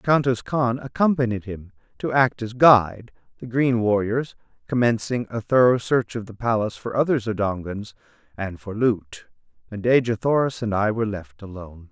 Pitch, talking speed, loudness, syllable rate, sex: 115 Hz, 160 wpm, -22 LUFS, 5.0 syllables/s, male